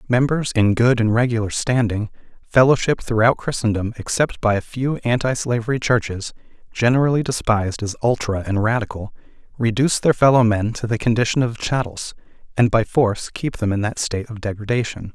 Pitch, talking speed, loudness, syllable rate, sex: 115 Hz, 160 wpm, -19 LUFS, 5.7 syllables/s, male